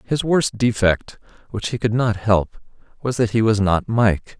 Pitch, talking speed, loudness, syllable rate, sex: 110 Hz, 165 wpm, -19 LUFS, 4.2 syllables/s, male